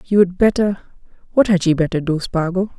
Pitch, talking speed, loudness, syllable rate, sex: 180 Hz, 150 wpm, -17 LUFS, 5.2 syllables/s, female